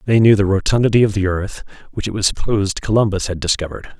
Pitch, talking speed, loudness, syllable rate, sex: 100 Hz, 210 wpm, -17 LUFS, 6.7 syllables/s, male